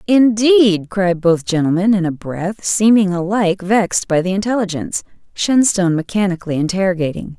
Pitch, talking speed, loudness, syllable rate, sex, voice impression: 190 Hz, 130 wpm, -16 LUFS, 5.3 syllables/s, female, feminine, slightly adult-like, slightly fluent, slightly cute, friendly, slightly kind